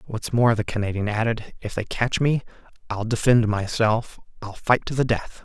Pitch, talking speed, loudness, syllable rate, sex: 110 Hz, 190 wpm, -23 LUFS, 4.9 syllables/s, male